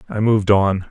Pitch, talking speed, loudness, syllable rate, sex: 100 Hz, 200 wpm, -16 LUFS, 5.6 syllables/s, male